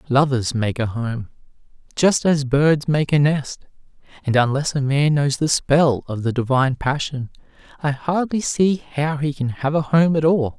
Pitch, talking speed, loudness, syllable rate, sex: 140 Hz, 180 wpm, -19 LUFS, 4.5 syllables/s, male